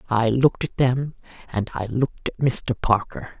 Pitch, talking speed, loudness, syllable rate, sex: 120 Hz, 175 wpm, -23 LUFS, 4.7 syllables/s, female